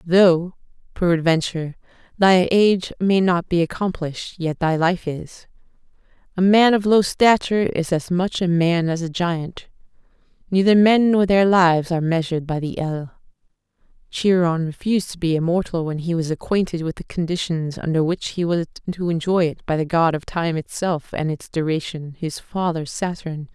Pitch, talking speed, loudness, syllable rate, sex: 175 Hz, 170 wpm, -20 LUFS, 4.9 syllables/s, female